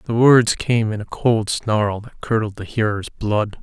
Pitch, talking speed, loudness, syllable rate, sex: 110 Hz, 200 wpm, -19 LUFS, 3.9 syllables/s, male